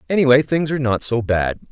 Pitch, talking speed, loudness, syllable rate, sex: 130 Hz, 210 wpm, -18 LUFS, 6.2 syllables/s, male